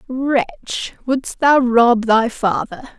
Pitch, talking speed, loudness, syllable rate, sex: 240 Hz, 120 wpm, -17 LUFS, 3.3 syllables/s, female